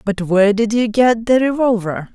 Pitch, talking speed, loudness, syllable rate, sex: 220 Hz, 195 wpm, -15 LUFS, 4.9 syllables/s, female